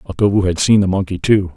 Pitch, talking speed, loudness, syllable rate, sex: 95 Hz, 230 wpm, -15 LUFS, 6.4 syllables/s, male